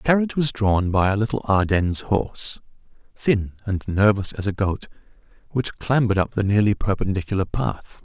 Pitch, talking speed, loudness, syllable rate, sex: 105 Hz, 165 wpm, -22 LUFS, 5.4 syllables/s, male